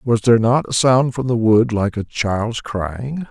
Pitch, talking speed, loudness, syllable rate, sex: 115 Hz, 220 wpm, -17 LUFS, 4.0 syllables/s, male